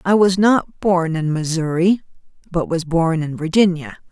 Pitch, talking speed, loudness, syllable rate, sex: 175 Hz, 160 wpm, -18 LUFS, 4.4 syllables/s, female